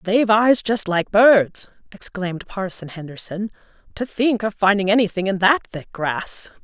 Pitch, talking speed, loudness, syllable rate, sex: 200 Hz, 155 wpm, -19 LUFS, 4.6 syllables/s, female